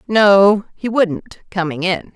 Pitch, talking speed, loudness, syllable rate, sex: 195 Hz, 140 wpm, -15 LUFS, 3.4 syllables/s, female